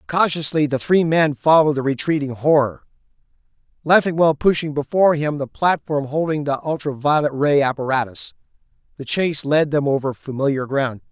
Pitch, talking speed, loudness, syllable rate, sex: 145 Hz, 145 wpm, -19 LUFS, 5.4 syllables/s, male